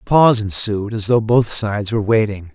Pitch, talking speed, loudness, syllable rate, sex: 110 Hz, 210 wpm, -16 LUFS, 5.8 syllables/s, male